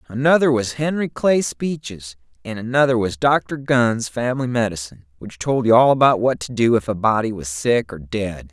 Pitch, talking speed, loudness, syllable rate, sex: 115 Hz, 190 wpm, -19 LUFS, 5.0 syllables/s, male